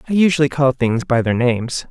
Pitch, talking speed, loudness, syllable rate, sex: 135 Hz, 220 wpm, -17 LUFS, 5.9 syllables/s, male